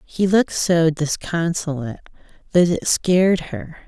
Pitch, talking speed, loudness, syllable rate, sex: 165 Hz, 125 wpm, -19 LUFS, 4.5 syllables/s, female